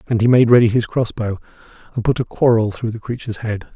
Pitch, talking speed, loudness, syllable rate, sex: 115 Hz, 225 wpm, -17 LUFS, 6.4 syllables/s, male